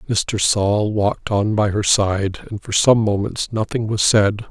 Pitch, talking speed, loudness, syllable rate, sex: 105 Hz, 185 wpm, -18 LUFS, 4.1 syllables/s, male